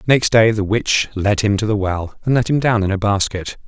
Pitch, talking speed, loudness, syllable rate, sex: 105 Hz, 260 wpm, -17 LUFS, 5.1 syllables/s, male